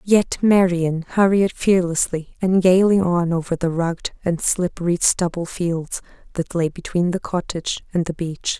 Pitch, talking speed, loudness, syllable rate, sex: 175 Hz, 155 wpm, -20 LUFS, 4.5 syllables/s, female